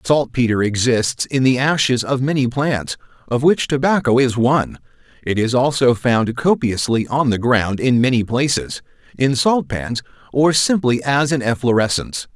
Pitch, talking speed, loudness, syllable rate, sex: 130 Hz, 150 wpm, -17 LUFS, 4.6 syllables/s, male